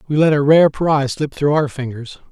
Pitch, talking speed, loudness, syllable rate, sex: 140 Hz, 235 wpm, -16 LUFS, 5.3 syllables/s, male